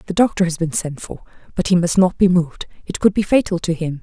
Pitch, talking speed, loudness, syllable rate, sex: 175 Hz, 270 wpm, -18 LUFS, 6.3 syllables/s, female